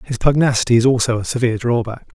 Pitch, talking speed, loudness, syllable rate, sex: 120 Hz, 190 wpm, -17 LUFS, 6.9 syllables/s, male